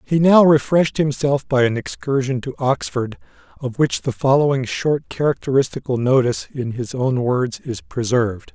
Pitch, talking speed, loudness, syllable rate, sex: 135 Hz, 155 wpm, -19 LUFS, 5.0 syllables/s, male